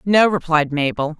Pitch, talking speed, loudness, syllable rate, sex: 165 Hz, 150 wpm, -17 LUFS, 4.6 syllables/s, female